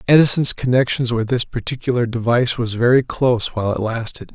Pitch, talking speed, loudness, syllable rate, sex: 120 Hz, 165 wpm, -18 LUFS, 6.1 syllables/s, male